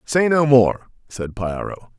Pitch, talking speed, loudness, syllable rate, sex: 120 Hz, 150 wpm, -18 LUFS, 3.7 syllables/s, male